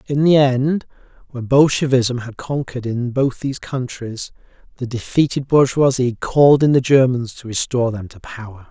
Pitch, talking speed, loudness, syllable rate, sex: 130 Hz, 160 wpm, -17 LUFS, 5.0 syllables/s, male